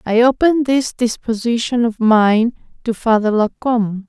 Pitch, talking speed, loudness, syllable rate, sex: 230 Hz, 145 wpm, -16 LUFS, 4.8 syllables/s, female